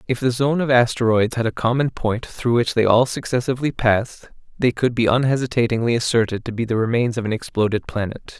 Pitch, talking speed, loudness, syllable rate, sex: 120 Hz, 200 wpm, -20 LUFS, 5.9 syllables/s, male